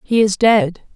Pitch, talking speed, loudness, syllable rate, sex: 215 Hz, 190 wpm, -15 LUFS, 3.8 syllables/s, female